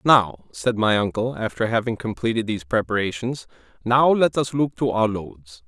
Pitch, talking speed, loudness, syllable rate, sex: 115 Hz, 170 wpm, -22 LUFS, 5.0 syllables/s, male